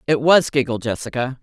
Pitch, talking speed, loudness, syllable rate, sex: 135 Hz, 170 wpm, -18 LUFS, 5.5 syllables/s, female